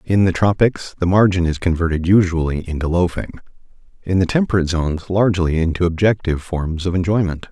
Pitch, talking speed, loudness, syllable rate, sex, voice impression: 90 Hz, 160 wpm, -18 LUFS, 6.0 syllables/s, male, masculine, adult-like, slightly thick, cool, intellectual, calm